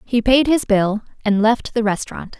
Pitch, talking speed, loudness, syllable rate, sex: 225 Hz, 200 wpm, -18 LUFS, 4.9 syllables/s, female